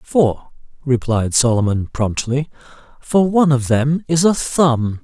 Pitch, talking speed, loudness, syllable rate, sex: 135 Hz, 130 wpm, -17 LUFS, 3.9 syllables/s, male